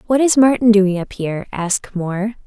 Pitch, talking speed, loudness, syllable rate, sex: 210 Hz, 195 wpm, -16 LUFS, 5.5 syllables/s, female